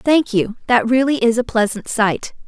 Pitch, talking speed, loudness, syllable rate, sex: 240 Hz, 195 wpm, -17 LUFS, 4.5 syllables/s, female